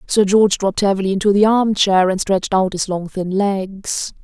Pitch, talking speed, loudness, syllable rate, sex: 195 Hz, 210 wpm, -17 LUFS, 5.2 syllables/s, female